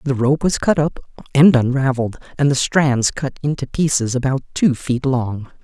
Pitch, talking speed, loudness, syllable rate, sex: 135 Hz, 180 wpm, -18 LUFS, 4.7 syllables/s, male